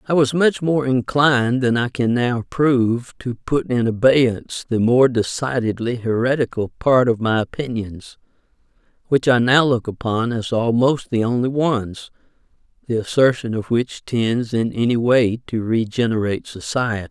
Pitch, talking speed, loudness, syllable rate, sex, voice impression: 120 Hz, 150 wpm, -19 LUFS, 4.6 syllables/s, male, masculine, middle-aged, powerful, slightly weak, slightly soft, muffled, raspy, mature, friendly, wild, slightly lively, slightly intense